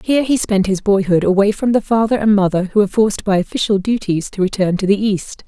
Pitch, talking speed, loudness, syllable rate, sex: 205 Hz, 240 wpm, -16 LUFS, 6.2 syllables/s, female